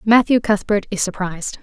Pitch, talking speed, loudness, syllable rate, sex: 205 Hz, 150 wpm, -18 LUFS, 5.4 syllables/s, female